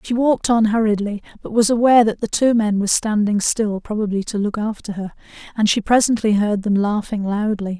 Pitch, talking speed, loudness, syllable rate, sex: 215 Hz, 200 wpm, -18 LUFS, 5.6 syllables/s, female